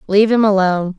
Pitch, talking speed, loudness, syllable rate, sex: 200 Hz, 180 wpm, -14 LUFS, 7.2 syllables/s, female